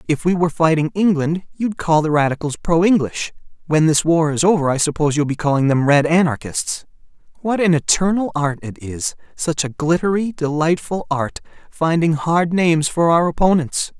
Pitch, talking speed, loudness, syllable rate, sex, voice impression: 160 Hz, 165 wpm, -18 LUFS, 5.1 syllables/s, male, very masculine, adult-like, slightly middle-aged, thick, tensed, powerful, bright, slightly soft, slightly muffled, slightly fluent, cool, very intellectual, very refreshing, sincere, very calm, slightly mature, friendly, reassuring, unique, elegant, slightly wild, sweet, very lively, kind, slightly intense